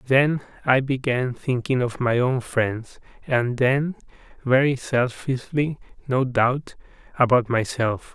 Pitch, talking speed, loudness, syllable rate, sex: 130 Hz, 120 wpm, -22 LUFS, 3.7 syllables/s, male